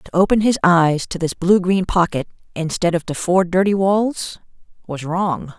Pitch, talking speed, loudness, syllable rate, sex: 180 Hz, 185 wpm, -18 LUFS, 4.5 syllables/s, female